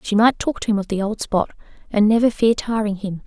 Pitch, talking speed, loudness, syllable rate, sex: 215 Hz, 255 wpm, -20 LUFS, 5.7 syllables/s, female